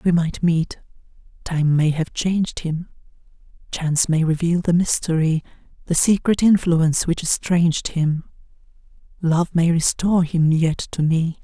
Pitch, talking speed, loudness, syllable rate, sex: 165 Hz, 135 wpm, -19 LUFS, 4.6 syllables/s, female